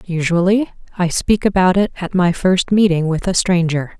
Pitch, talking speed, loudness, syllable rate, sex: 180 Hz, 180 wpm, -16 LUFS, 4.8 syllables/s, female